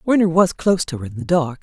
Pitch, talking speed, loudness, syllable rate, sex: 165 Hz, 295 wpm, -18 LUFS, 6.7 syllables/s, female